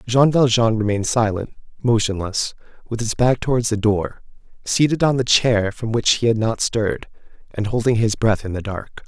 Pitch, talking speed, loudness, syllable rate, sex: 110 Hz, 185 wpm, -19 LUFS, 5.1 syllables/s, male